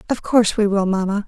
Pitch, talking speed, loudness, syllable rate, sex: 205 Hz, 235 wpm, -18 LUFS, 6.5 syllables/s, female